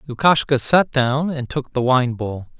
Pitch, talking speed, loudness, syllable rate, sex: 130 Hz, 185 wpm, -19 LUFS, 4.3 syllables/s, male